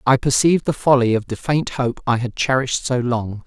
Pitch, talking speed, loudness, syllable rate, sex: 125 Hz, 225 wpm, -19 LUFS, 5.4 syllables/s, male